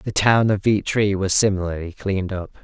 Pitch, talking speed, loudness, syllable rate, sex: 100 Hz, 180 wpm, -20 LUFS, 5.2 syllables/s, male